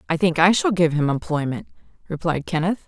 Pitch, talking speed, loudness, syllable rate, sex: 170 Hz, 190 wpm, -21 LUFS, 5.7 syllables/s, female